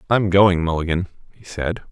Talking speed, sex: 155 wpm, male